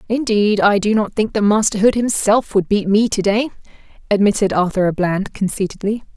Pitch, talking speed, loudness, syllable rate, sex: 205 Hz, 185 wpm, -17 LUFS, 5.3 syllables/s, female